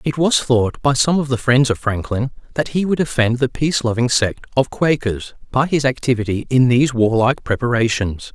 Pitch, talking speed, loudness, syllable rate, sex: 125 Hz, 195 wpm, -17 LUFS, 5.3 syllables/s, male